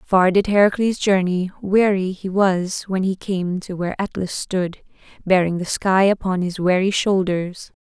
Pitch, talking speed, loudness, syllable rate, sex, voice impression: 190 Hz, 160 wpm, -19 LUFS, 4.4 syllables/s, female, very feminine, adult-like, thin, tensed, slightly weak, bright, soft, clear, slightly fluent, cute, intellectual, refreshing, sincere, calm, friendly, very reassuring, unique, very elegant, slightly wild, sweet, lively, very kind, modest, slightly light